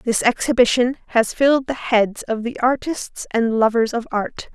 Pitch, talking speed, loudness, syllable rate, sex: 240 Hz, 170 wpm, -19 LUFS, 4.6 syllables/s, female